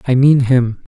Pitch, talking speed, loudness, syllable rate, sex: 130 Hz, 190 wpm, -13 LUFS, 4.3 syllables/s, male